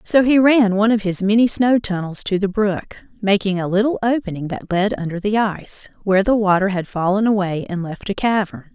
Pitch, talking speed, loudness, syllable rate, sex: 200 Hz, 215 wpm, -18 LUFS, 5.5 syllables/s, female